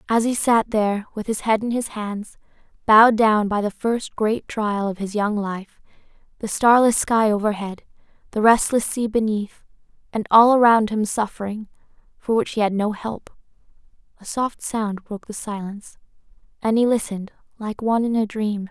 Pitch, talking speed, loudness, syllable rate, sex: 215 Hz, 175 wpm, -20 LUFS, 4.9 syllables/s, female